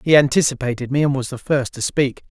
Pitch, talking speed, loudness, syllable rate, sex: 135 Hz, 225 wpm, -19 LUFS, 6.1 syllables/s, male